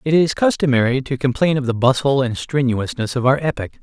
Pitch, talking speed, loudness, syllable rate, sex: 135 Hz, 205 wpm, -18 LUFS, 5.8 syllables/s, male